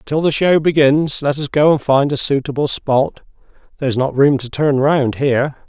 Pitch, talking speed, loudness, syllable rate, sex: 140 Hz, 200 wpm, -16 LUFS, 4.9 syllables/s, male